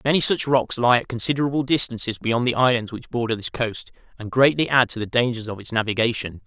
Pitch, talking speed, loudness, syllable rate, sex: 120 Hz, 215 wpm, -21 LUFS, 6.1 syllables/s, male